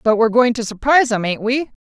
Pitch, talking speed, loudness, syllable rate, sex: 235 Hz, 255 wpm, -16 LUFS, 6.7 syllables/s, female